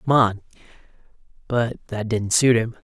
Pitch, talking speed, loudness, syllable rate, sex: 115 Hz, 145 wpm, -21 LUFS, 4.3 syllables/s, male